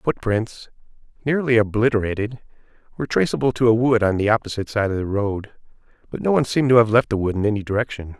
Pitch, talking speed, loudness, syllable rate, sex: 110 Hz, 200 wpm, -20 LUFS, 6.7 syllables/s, male